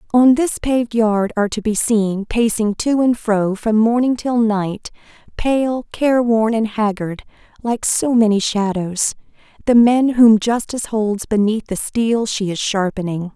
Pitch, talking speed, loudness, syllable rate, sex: 220 Hz, 150 wpm, -17 LUFS, 4.2 syllables/s, female